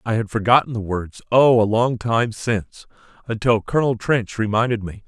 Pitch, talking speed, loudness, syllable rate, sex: 110 Hz, 155 wpm, -19 LUFS, 5.1 syllables/s, male